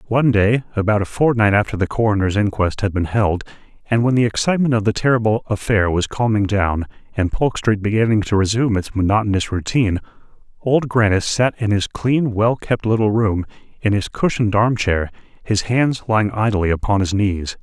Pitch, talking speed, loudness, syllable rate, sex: 105 Hz, 180 wpm, -18 LUFS, 5.5 syllables/s, male